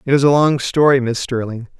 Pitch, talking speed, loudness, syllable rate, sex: 130 Hz, 235 wpm, -15 LUFS, 5.6 syllables/s, male